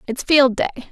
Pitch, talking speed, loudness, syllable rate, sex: 265 Hz, 195 wpm, -17 LUFS, 5.5 syllables/s, female